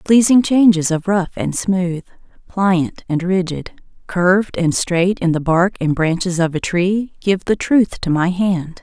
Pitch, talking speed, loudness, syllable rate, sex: 180 Hz, 185 wpm, -17 LUFS, 4.2 syllables/s, female